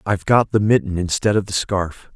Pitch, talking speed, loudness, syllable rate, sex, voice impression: 100 Hz, 225 wpm, -19 LUFS, 5.5 syllables/s, male, masculine, adult-like, slightly thick, cool, slightly intellectual, sincere